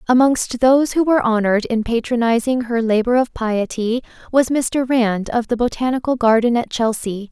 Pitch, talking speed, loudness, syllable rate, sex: 240 Hz, 165 wpm, -18 LUFS, 5.1 syllables/s, female